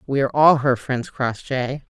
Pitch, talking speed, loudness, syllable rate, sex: 135 Hz, 155 wpm, -20 LUFS, 4.1 syllables/s, female